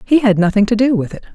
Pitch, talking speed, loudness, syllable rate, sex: 220 Hz, 310 wpm, -14 LUFS, 7.0 syllables/s, female